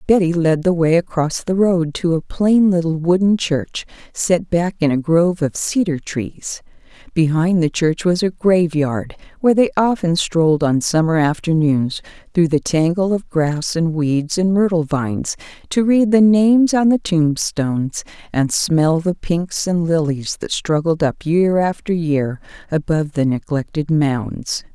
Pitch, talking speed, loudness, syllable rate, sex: 170 Hz, 160 wpm, -17 LUFS, 4.2 syllables/s, female